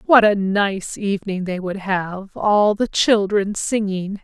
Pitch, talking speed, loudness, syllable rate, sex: 200 Hz, 155 wpm, -19 LUFS, 3.7 syllables/s, female